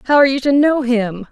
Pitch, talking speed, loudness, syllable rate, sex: 260 Hz, 275 wpm, -15 LUFS, 6.2 syllables/s, female